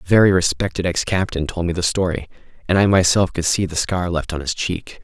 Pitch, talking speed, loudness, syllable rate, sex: 90 Hz, 240 wpm, -19 LUFS, 5.7 syllables/s, male